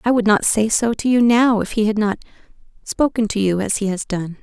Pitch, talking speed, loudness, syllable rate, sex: 215 Hz, 245 wpm, -18 LUFS, 5.4 syllables/s, female